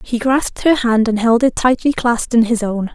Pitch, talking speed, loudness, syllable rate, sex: 235 Hz, 245 wpm, -15 LUFS, 5.3 syllables/s, female